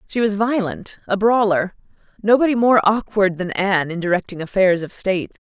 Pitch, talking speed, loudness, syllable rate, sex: 200 Hz, 165 wpm, -18 LUFS, 5.4 syllables/s, female